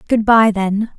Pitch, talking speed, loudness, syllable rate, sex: 215 Hz, 185 wpm, -14 LUFS, 4.0 syllables/s, female